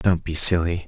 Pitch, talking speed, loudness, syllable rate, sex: 85 Hz, 205 wpm, -19 LUFS, 4.8 syllables/s, male